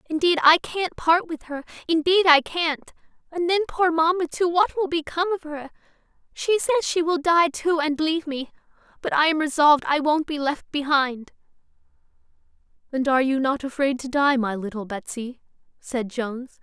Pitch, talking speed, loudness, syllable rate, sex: 300 Hz, 170 wpm, -22 LUFS, 5.2 syllables/s, female